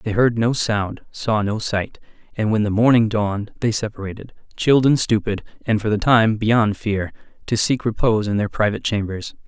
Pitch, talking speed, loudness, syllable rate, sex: 110 Hz, 190 wpm, -20 LUFS, 5.2 syllables/s, male